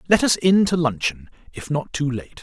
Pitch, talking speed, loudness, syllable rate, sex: 150 Hz, 225 wpm, -20 LUFS, 5.0 syllables/s, male